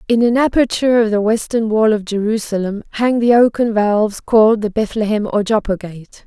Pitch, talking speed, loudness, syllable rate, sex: 220 Hz, 180 wpm, -15 LUFS, 5.4 syllables/s, female